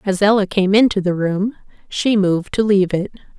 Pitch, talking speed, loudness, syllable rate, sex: 195 Hz, 195 wpm, -17 LUFS, 5.5 syllables/s, female